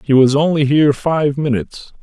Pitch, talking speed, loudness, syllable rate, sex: 140 Hz, 180 wpm, -15 LUFS, 5.4 syllables/s, male